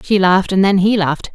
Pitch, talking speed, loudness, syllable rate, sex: 190 Hz, 270 wpm, -14 LUFS, 6.4 syllables/s, female